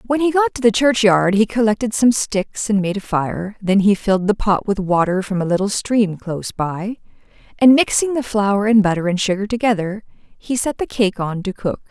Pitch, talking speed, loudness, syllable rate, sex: 210 Hz, 215 wpm, -17 LUFS, 5.0 syllables/s, female